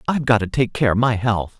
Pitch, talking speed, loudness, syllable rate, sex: 115 Hz, 300 wpm, -19 LUFS, 6.4 syllables/s, male